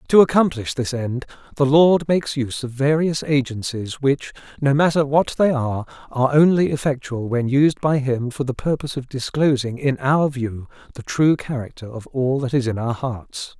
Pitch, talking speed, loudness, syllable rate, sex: 135 Hz, 185 wpm, -20 LUFS, 5.0 syllables/s, male